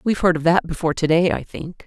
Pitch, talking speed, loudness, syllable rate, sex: 170 Hz, 290 wpm, -19 LUFS, 6.8 syllables/s, female